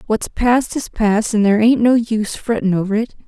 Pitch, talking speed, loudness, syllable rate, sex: 220 Hz, 220 wpm, -16 LUFS, 5.3 syllables/s, female